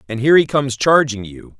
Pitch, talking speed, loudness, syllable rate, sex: 120 Hz, 225 wpm, -15 LUFS, 6.4 syllables/s, male